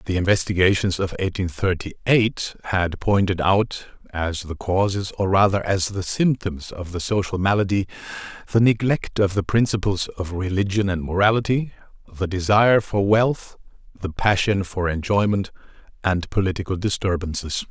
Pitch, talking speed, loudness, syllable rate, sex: 95 Hz, 140 wpm, -21 LUFS, 5.0 syllables/s, male